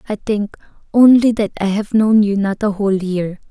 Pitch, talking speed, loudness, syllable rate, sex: 205 Hz, 205 wpm, -15 LUFS, 5.0 syllables/s, female